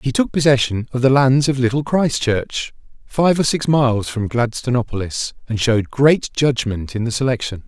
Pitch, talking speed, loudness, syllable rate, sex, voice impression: 125 Hz, 170 wpm, -18 LUFS, 4.9 syllables/s, male, masculine, adult-like, fluent, intellectual, refreshing, slightly calm, friendly